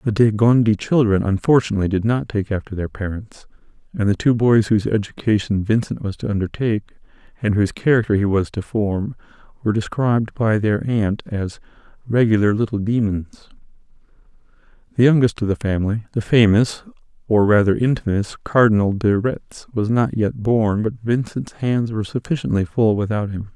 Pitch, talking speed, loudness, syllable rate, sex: 110 Hz, 160 wpm, -19 LUFS, 5.4 syllables/s, male